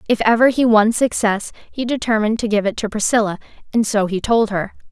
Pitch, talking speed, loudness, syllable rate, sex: 220 Hz, 195 wpm, -17 LUFS, 5.7 syllables/s, female